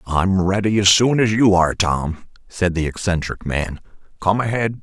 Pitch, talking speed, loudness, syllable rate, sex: 95 Hz, 175 wpm, -18 LUFS, 4.6 syllables/s, male